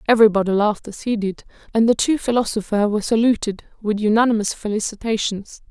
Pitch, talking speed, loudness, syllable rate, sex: 215 Hz, 145 wpm, -19 LUFS, 6.4 syllables/s, female